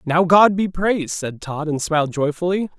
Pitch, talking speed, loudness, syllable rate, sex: 165 Hz, 195 wpm, -19 LUFS, 4.9 syllables/s, male